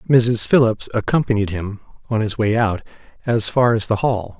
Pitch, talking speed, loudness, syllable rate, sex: 110 Hz, 175 wpm, -18 LUFS, 5.0 syllables/s, male